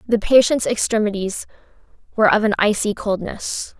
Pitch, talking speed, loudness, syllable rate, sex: 215 Hz, 125 wpm, -18 LUFS, 5.3 syllables/s, female